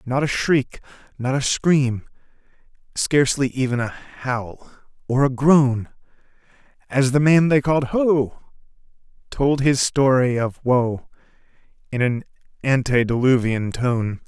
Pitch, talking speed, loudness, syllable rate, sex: 130 Hz, 120 wpm, -20 LUFS, 3.9 syllables/s, male